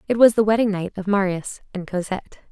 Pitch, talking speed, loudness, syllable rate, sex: 200 Hz, 215 wpm, -21 LUFS, 6.3 syllables/s, female